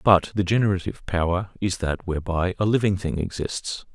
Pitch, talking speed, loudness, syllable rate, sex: 95 Hz, 165 wpm, -24 LUFS, 5.5 syllables/s, male